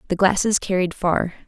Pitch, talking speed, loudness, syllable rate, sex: 185 Hz, 165 wpm, -20 LUFS, 5.2 syllables/s, female